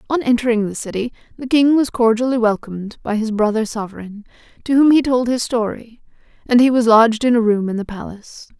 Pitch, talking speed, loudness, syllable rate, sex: 230 Hz, 200 wpm, -17 LUFS, 6.0 syllables/s, female